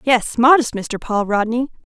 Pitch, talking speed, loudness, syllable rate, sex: 235 Hz, 160 wpm, -17 LUFS, 4.4 syllables/s, female